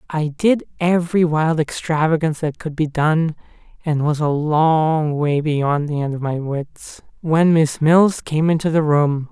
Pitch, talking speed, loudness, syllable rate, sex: 155 Hz, 175 wpm, -18 LUFS, 4.1 syllables/s, male